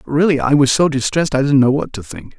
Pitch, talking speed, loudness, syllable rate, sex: 140 Hz, 275 wpm, -15 LUFS, 6.2 syllables/s, male